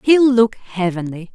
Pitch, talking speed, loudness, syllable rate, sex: 215 Hz, 135 wpm, -16 LUFS, 4.6 syllables/s, female